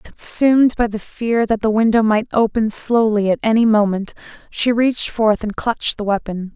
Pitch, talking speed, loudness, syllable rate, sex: 220 Hz, 185 wpm, -17 LUFS, 5.0 syllables/s, female